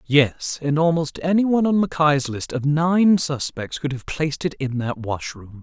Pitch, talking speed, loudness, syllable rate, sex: 150 Hz, 190 wpm, -21 LUFS, 4.6 syllables/s, female